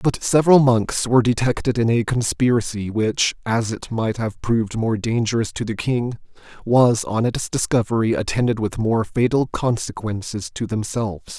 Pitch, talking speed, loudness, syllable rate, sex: 115 Hz, 160 wpm, -20 LUFS, 4.9 syllables/s, male